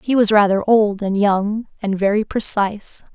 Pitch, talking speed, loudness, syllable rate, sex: 205 Hz, 170 wpm, -17 LUFS, 4.6 syllables/s, female